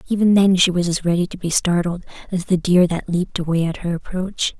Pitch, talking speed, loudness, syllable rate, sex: 180 Hz, 235 wpm, -19 LUFS, 5.8 syllables/s, female